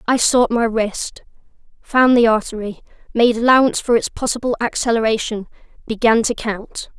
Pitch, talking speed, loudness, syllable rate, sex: 230 Hz, 135 wpm, -17 LUFS, 5.2 syllables/s, female